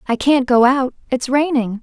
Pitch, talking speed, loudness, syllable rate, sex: 260 Hz, 200 wpm, -16 LUFS, 4.6 syllables/s, female